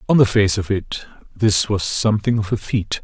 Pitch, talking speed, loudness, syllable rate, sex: 105 Hz, 215 wpm, -18 LUFS, 5.1 syllables/s, male